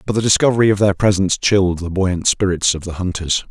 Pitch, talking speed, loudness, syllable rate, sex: 95 Hz, 220 wpm, -16 LUFS, 6.3 syllables/s, male